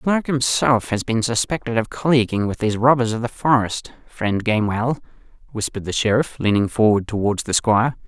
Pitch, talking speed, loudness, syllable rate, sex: 115 Hz, 180 wpm, -20 LUFS, 5.7 syllables/s, male